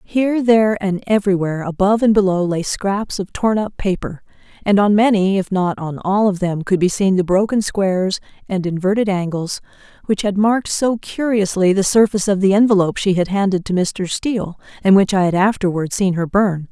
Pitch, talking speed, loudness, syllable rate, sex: 195 Hz, 195 wpm, -17 LUFS, 5.5 syllables/s, female